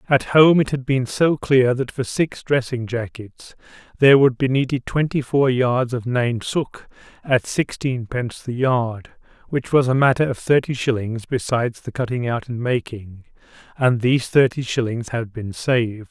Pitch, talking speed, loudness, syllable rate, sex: 125 Hz, 170 wpm, -20 LUFS, 4.6 syllables/s, male